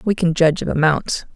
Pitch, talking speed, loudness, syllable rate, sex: 170 Hz, 220 wpm, -18 LUFS, 5.8 syllables/s, female